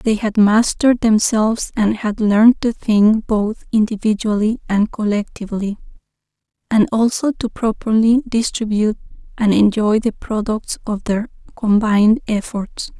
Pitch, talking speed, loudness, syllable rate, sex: 220 Hz, 120 wpm, -17 LUFS, 4.5 syllables/s, female